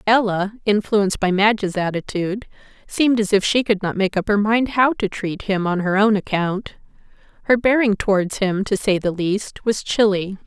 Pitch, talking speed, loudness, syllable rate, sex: 205 Hz, 190 wpm, -19 LUFS, 5.0 syllables/s, female